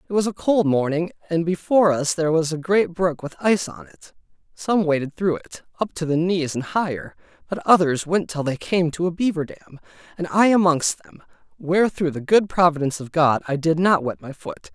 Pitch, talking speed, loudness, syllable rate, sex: 165 Hz, 220 wpm, -21 LUFS, 5.5 syllables/s, male